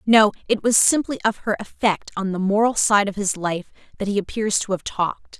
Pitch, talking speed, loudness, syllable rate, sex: 205 Hz, 220 wpm, -21 LUFS, 5.3 syllables/s, female